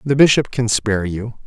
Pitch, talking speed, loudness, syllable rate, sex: 115 Hz, 205 wpm, -17 LUFS, 5.3 syllables/s, male